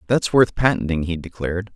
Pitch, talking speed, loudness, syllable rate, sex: 100 Hz, 170 wpm, -20 LUFS, 5.8 syllables/s, male